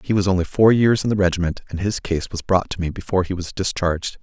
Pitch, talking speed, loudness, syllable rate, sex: 95 Hz, 270 wpm, -20 LUFS, 6.4 syllables/s, male